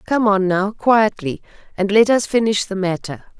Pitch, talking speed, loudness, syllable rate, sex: 205 Hz, 175 wpm, -17 LUFS, 4.6 syllables/s, female